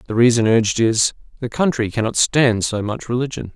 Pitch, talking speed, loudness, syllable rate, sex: 115 Hz, 170 wpm, -18 LUFS, 5.5 syllables/s, male